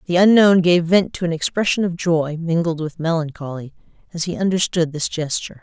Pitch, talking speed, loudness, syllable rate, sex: 170 Hz, 180 wpm, -18 LUFS, 5.5 syllables/s, female